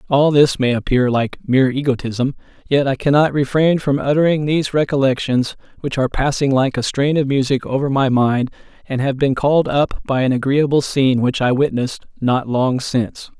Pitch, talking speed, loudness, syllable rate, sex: 135 Hz, 185 wpm, -17 LUFS, 5.4 syllables/s, male